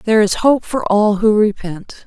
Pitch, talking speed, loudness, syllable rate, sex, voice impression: 210 Hz, 205 wpm, -14 LUFS, 4.7 syllables/s, female, very feminine, adult-like, slightly middle-aged, very thin, slightly relaxed, very weak, slightly dark, soft, muffled, slightly halting, slightly raspy, slightly cute, intellectual, sincere, slightly calm, friendly, slightly reassuring, slightly unique, elegant, kind, modest